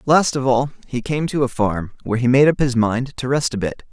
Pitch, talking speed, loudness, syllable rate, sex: 125 Hz, 275 wpm, -19 LUFS, 5.4 syllables/s, male